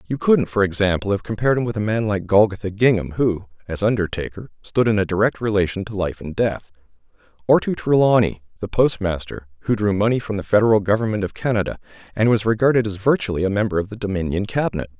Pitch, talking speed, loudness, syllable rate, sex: 105 Hz, 200 wpm, -20 LUFS, 6.4 syllables/s, male